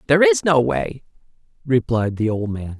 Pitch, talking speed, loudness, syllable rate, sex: 125 Hz, 170 wpm, -19 LUFS, 5.0 syllables/s, male